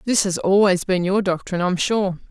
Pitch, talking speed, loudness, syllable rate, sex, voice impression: 190 Hz, 235 wpm, -19 LUFS, 5.8 syllables/s, female, feminine, middle-aged, thick, slightly relaxed, slightly powerful, soft, raspy, intellectual, calm, slightly friendly, kind, modest